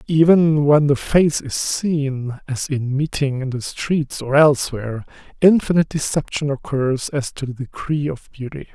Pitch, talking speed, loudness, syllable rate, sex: 145 Hz, 160 wpm, -19 LUFS, 4.5 syllables/s, male